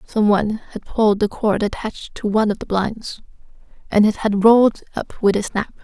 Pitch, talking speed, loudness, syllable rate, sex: 210 Hz, 195 wpm, -19 LUFS, 5.6 syllables/s, female